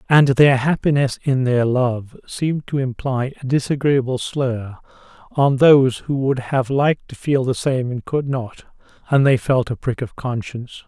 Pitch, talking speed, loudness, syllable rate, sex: 130 Hz, 170 wpm, -19 LUFS, 4.5 syllables/s, male